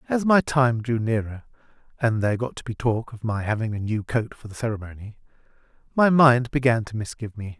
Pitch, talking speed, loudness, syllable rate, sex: 115 Hz, 205 wpm, -23 LUFS, 5.7 syllables/s, male